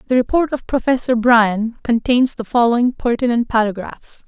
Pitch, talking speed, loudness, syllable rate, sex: 240 Hz, 140 wpm, -16 LUFS, 5.0 syllables/s, female